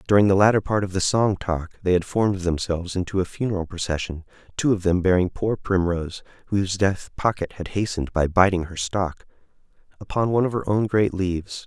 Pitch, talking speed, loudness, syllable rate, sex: 95 Hz, 195 wpm, -23 LUFS, 5.9 syllables/s, male